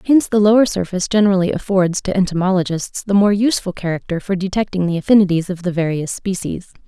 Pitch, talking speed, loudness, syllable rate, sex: 190 Hz, 175 wpm, -17 LUFS, 6.6 syllables/s, female